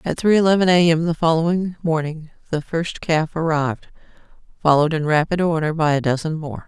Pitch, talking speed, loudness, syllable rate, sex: 160 Hz, 180 wpm, -19 LUFS, 5.7 syllables/s, female